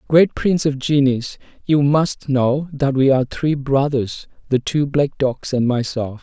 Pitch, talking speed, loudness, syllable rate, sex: 135 Hz, 175 wpm, -18 LUFS, 4.1 syllables/s, male